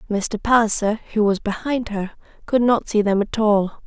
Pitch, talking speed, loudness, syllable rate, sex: 215 Hz, 185 wpm, -20 LUFS, 4.8 syllables/s, female